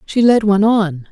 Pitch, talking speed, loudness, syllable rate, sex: 205 Hz, 215 wpm, -13 LUFS, 5.1 syllables/s, female